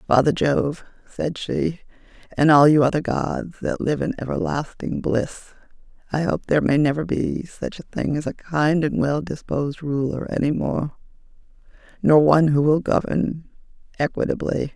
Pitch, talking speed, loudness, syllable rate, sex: 150 Hz, 155 wpm, -21 LUFS, 4.9 syllables/s, female